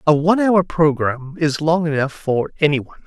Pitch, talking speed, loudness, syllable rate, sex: 155 Hz, 195 wpm, -18 LUFS, 5.7 syllables/s, male